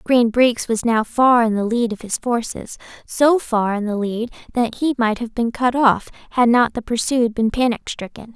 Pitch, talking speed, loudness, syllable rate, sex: 235 Hz, 215 wpm, -19 LUFS, 4.6 syllables/s, female